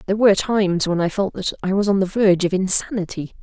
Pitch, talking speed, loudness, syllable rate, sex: 195 Hz, 245 wpm, -19 LUFS, 6.7 syllables/s, female